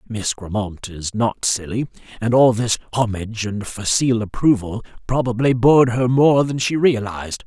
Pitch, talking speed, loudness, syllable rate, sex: 115 Hz, 155 wpm, -19 LUFS, 4.9 syllables/s, male